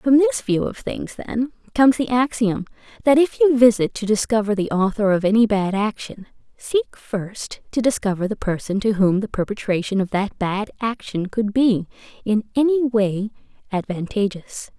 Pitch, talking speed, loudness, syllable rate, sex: 215 Hz, 165 wpm, -20 LUFS, 4.7 syllables/s, female